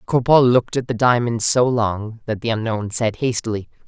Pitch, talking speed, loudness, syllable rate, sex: 115 Hz, 185 wpm, -19 LUFS, 5.4 syllables/s, female